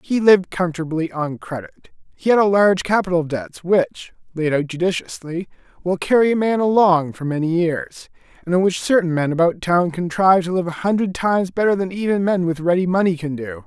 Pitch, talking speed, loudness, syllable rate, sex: 175 Hz, 200 wpm, -19 LUFS, 5.8 syllables/s, male